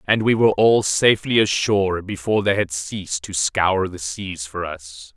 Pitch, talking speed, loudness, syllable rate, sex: 95 Hz, 185 wpm, -20 LUFS, 4.8 syllables/s, male